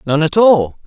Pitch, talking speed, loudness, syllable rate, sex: 165 Hz, 210 wpm, -12 LUFS, 4.4 syllables/s, male